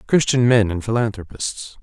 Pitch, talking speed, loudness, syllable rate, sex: 110 Hz, 130 wpm, -19 LUFS, 4.9 syllables/s, male